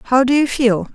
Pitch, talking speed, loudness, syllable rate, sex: 255 Hz, 255 wpm, -15 LUFS, 4.5 syllables/s, female